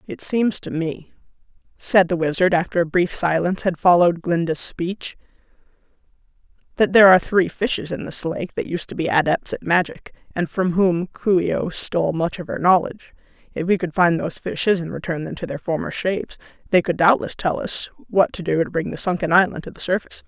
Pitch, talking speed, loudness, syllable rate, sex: 175 Hz, 205 wpm, -20 LUFS, 5.7 syllables/s, female